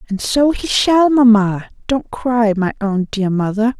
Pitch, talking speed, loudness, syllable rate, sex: 225 Hz, 175 wpm, -15 LUFS, 4.0 syllables/s, female